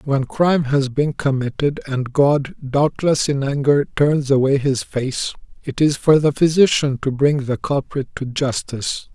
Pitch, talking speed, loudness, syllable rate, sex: 140 Hz, 165 wpm, -18 LUFS, 4.3 syllables/s, male